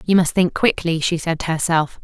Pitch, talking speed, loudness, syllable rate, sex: 170 Hz, 235 wpm, -19 LUFS, 5.4 syllables/s, female